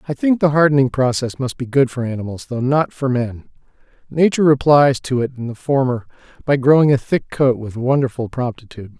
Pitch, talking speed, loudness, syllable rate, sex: 130 Hz, 195 wpm, -17 LUFS, 5.7 syllables/s, male